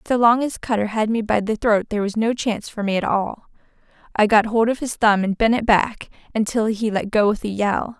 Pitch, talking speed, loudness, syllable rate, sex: 215 Hz, 255 wpm, -20 LUFS, 5.5 syllables/s, female